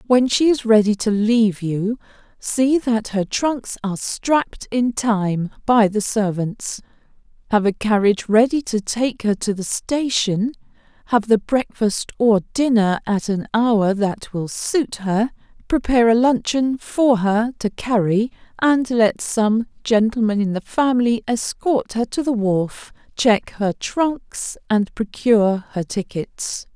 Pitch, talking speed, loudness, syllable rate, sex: 225 Hz, 150 wpm, -19 LUFS, 3.8 syllables/s, female